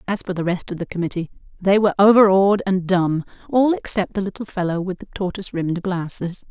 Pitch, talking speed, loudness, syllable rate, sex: 190 Hz, 205 wpm, -20 LUFS, 6.2 syllables/s, female